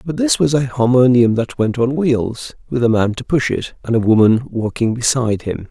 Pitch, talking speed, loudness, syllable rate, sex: 120 Hz, 220 wpm, -16 LUFS, 5.0 syllables/s, male